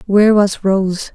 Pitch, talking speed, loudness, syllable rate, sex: 200 Hz, 155 wpm, -14 LUFS, 4.0 syllables/s, female